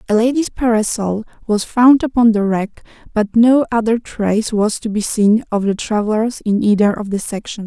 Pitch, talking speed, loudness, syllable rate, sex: 220 Hz, 190 wpm, -16 LUFS, 5.0 syllables/s, female